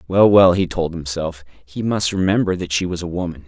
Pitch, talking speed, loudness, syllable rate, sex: 90 Hz, 225 wpm, -18 LUFS, 5.3 syllables/s, male